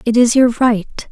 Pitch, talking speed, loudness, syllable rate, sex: 235 Hz, 215 wpm, -14 LUFS, 5.0 syllables/s, female